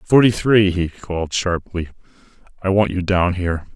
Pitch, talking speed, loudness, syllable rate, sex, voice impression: 95 Hz, 160 wpm, -19 LUFS, 4.8 syllables/s, male, very masculine, old, very relaxed, weak, dark, slightly hard, very muffled, slightly fluent, slightly raspy, cool, very intellectual, sincere, very calm, very mature, friendly, reassuring, very unique, slightly elegant, wild, slightly sweet, slightly lively, very kind, very modest